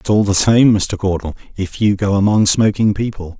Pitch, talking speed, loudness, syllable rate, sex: 100 Hz, 210 wpm, -15 LUFS, 5.1 syllables/s, male